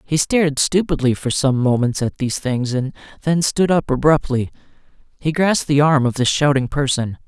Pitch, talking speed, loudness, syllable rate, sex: 140 Hz, 180 wpm, -18 LUFS, 5.3 syllables/s, male